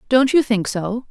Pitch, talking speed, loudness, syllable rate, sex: 230 Hz, 215 wpm, -18 LUFS, 4.4 syllables/s, female